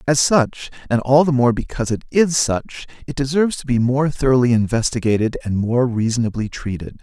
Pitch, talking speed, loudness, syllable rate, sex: 125 Hz, 180 wpm, -18 LUFS, 5.4 syllables/s, male